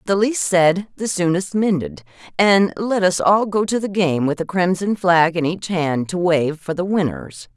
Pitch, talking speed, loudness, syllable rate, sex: 175 Hz, 205 wpm, -18 LUFS, 4.3 syllables/s, female